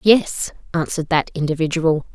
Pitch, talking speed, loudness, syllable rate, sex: 165 Hz, 110 wpm, -20 LUFS, 5.1 syllables/s, female